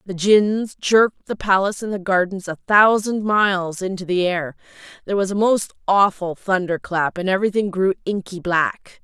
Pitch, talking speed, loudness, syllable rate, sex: 190 Hz, 175 wpm, -19 LUFS, 5.0 syllables/s, female